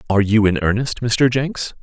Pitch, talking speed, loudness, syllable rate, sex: 115 Hz, 195 wpm, -17 LUFS, 5.0 syllables/s, male